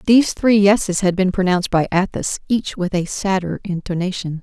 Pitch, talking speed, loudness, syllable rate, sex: 190 Hz, 175 wpm, -18 LUFS, 5.4 syllables/s, female